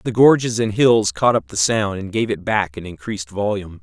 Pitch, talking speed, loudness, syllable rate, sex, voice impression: 100 Hz, 235 wpm, -18 LUFS, 5.4 syllables/s, male, very masculine, very middle-aged, very thick, tensed, very powerful, slightly bright, slightly hard, slightly muffled, fluent, slightly raspy, cool, very intellectual, refreshing, sincere, calm, very friendly, reassuring, unique, elegant, very wild, sweet, lively, kind, slightly intense